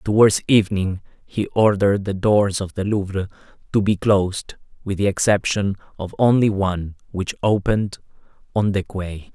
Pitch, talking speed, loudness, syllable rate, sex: 100 Hz, 150 wpm, -20 LUFS, 5.0 syllables/s, male